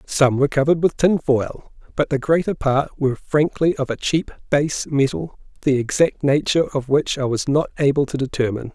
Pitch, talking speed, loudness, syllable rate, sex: 140 Hz, 190 wpm, -20 LUFS, 5.4 syllables/s, male